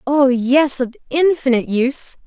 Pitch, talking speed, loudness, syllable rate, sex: 265 Hz, 135 wpm, -16 LUFS, 4.6 syllables/s, female